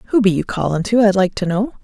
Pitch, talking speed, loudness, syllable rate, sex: 200 Hz, 295 wpm, -17 LUFS, 5.9 syllables/s, female